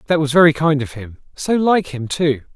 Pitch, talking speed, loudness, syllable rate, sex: 150 Hz, 235 wpm, -16 LUFS, 5.2 syllables/s, male